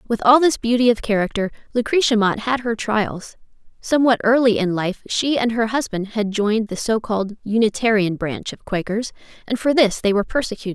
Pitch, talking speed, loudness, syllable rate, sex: 220 Hz, 185 wpm, -19 LUFS, 5.5 syllables/s, female